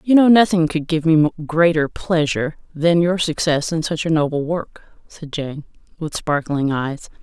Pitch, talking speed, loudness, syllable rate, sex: 160 Hz, 175 wpm, -18 LUFS, 4.6 syllables/s, female